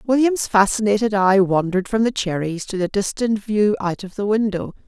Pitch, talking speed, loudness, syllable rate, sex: 205 Hz, 185 wpm, -19 LUFS, 5.2 syllables/s, female